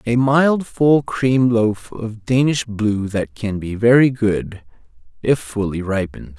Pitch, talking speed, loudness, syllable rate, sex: 115 Hz, 150 wpm, -18 LUFS, 3.7 syllables/s, male